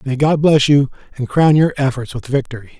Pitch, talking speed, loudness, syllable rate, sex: 135 Hz, 215 wpm, -15 LUFS, 5.6 syllables/s, male